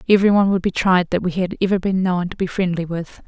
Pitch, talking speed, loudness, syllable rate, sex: 185 Hz, 275 wpm, -19 LUFS, 6.6 syllables/s, female